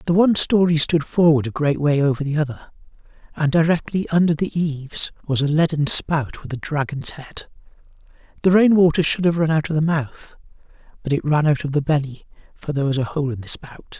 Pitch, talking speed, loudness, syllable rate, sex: 155 Hz, 210 wpm, -19 LUFS, 5.6 syllables/s, male